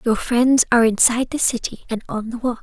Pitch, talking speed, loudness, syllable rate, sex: 235 Hz, 230 wpm, -18 LUFS, 6.0 syllables/s, female